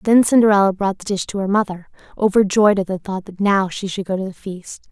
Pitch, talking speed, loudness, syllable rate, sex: 195 Hz, 245 wpm, -18 LUFS, 5.8 syllables/s, female